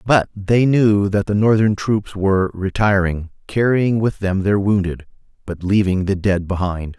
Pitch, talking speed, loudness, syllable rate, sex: 100 Hz, 165 wpm, -18 LUFS, 4.3 syllables/s, male